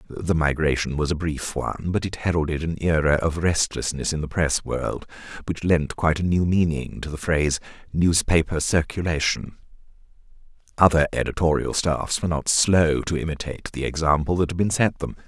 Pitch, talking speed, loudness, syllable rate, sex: 80 Hz, 170 wpm, -23 LUFS, 5.3 syllables/s, male